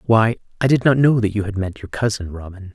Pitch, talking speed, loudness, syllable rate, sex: 105 Hz, 265 wpm, -19 LUFS, 6.0 syllables/s, male